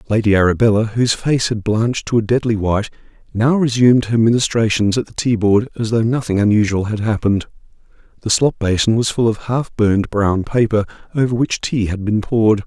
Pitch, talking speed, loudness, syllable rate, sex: 110 Hz, 190 wpm, -16 LUFS, 5.8 syllables/s, male